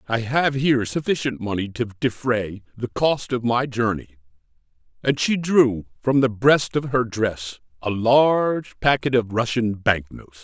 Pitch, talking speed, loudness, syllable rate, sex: 120 Hz, 160 wpm, -21 LUFS, 4.4 syllables/s, male